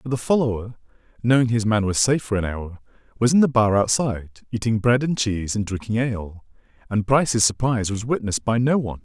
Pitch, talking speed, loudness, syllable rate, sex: 115 Hz, 205 wpm, -21 LUFS, 6.2 syllables/s, male